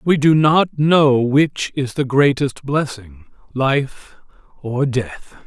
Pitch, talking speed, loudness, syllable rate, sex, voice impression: 135 Hz, 130 wpm, -17 LUFS, 3.0 syllables/s, male, masculine, very adult-like, powerful, slightly unique, slightly intense